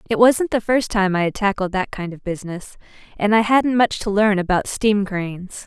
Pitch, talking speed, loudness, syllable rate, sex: 205 Hz, 220 wpm, -19 LUFS, 5.1 syllables/s, female